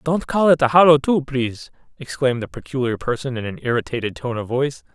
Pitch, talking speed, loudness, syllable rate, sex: 130 Hz, 205 wpm, -19 LUFS, 6.3 syllables/s, male